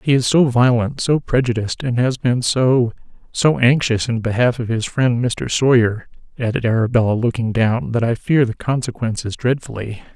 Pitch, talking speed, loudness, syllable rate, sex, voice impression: 120 Hz, 165 wpm, -18 LUFS, 5.0 syllables/s, male, masculine, slightly old, slightly thick, slightly muffled, sincere, calm, slightly elegant